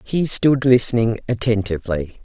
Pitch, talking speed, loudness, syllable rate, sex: 115 Hz, 105 wpm, -18 LUFS, 4.9 syllables/s, female